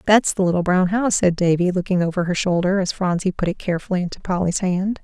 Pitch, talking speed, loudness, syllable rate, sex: 185 Hz, 225 wpm, -20 LUFS, 6.4 syllables/s, female